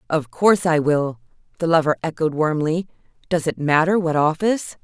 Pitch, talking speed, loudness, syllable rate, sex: 165 Hz, 160 wpm, -20 LUFS, 5.4 syllables/s, female